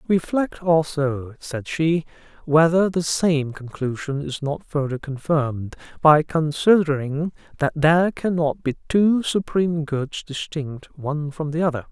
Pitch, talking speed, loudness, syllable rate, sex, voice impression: 155 Hz, 130 wpm, -22 LUFS, 4.1 syllables/s, male, masculine, very adult-like, slightly weak, sincere, slightly calm, kind